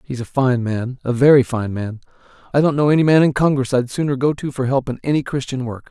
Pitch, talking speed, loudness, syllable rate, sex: 130 Hz, 255 wpm, -18 LUFS, 6.0 syllables/s, male